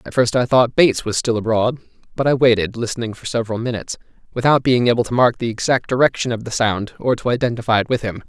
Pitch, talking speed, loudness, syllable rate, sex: 120 Hz, 230 wpm, -18 LUFS, 6.7 syllables/s, male